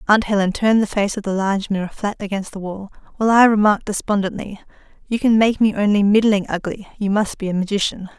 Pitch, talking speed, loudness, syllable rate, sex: 205 Hz, 215 wpm, -18 LUFS, 6.3 syllables/s, female